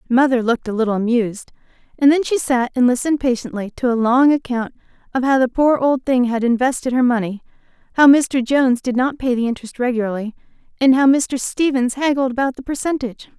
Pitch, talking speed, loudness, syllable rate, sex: 255 Hz, 195 wpm, -17 LUFS, 6.0 syllables/s, female